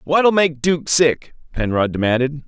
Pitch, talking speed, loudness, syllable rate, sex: 140 Hz, 145 wpm, -17 LUFS, 4.1 syllables/s, male